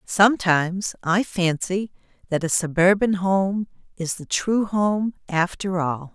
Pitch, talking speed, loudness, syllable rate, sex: 185 Hz, 125 wpm, -22 LUFS, 3.9 syllables/s, female